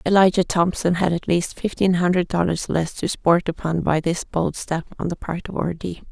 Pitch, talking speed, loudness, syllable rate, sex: 175 Hz, 205 wpm, -21 LUFS, 5.0 syllables/s, female